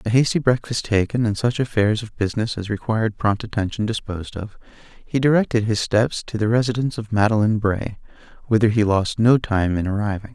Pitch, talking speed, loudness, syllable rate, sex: 110 Hz, 185 wpm, -21 LUFS, 5.9 syllables/s, male